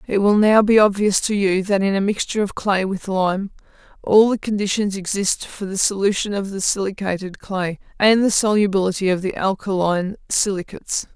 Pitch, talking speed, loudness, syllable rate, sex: 195 Hz, 175 wpm, -19 LUFS, 5.3 syllables/s, female